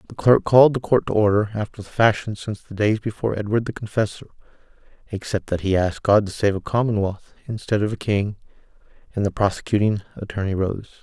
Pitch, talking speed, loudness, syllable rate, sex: 105 Hz, 180 wpm, -21 LUFS, 6.3 syllables/s, male